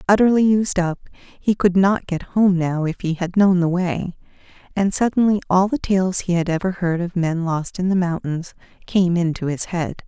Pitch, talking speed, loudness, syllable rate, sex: 180 Hz, 205 wpm, -19 LUFS, 4.8 syllables/s, female